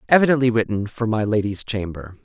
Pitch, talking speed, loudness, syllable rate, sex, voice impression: 110 Hz, 160 wpm, -21 LUFS, 5.9 syllables/s, male, masculine, adult-like, thick, tensed, powerful, slightly clear, fluent, cool, intellectual, slightly mature, friendly, lively, slightly light